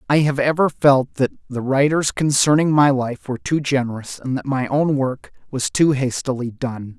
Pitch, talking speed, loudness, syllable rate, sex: 135 Hz, 190 wpm, -19 LUFS, 4.8 syllables/s, male